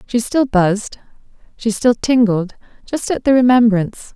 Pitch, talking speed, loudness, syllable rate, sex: 230 Hz, 145 wpm, -16 LUFS, 4.7 syllables/s, female